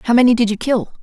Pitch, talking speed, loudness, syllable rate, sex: 230 Hz, 290 wpm, -15 LUFS, 7.6 syllables/s, female